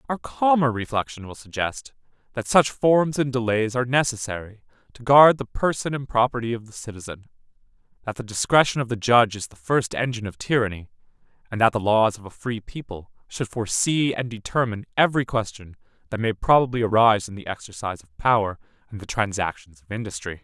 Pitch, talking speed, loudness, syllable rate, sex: 115 Hz, 180 wpm, -22 LUFS, 6.0 syllables/s, male